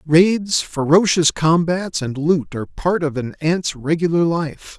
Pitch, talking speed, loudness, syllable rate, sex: 160 Hz, 150 wpm, -18 LUFS, 3.9 syllables/s, male